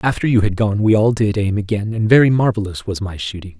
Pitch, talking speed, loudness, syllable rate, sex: 105 Hz, 250 wpm, -17 LUFS, 6.0 syllables/s, male